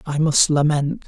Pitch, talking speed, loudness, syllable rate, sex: 150 Hz, 170 wpm, -18 LUFS, 4.2 syllables/s, male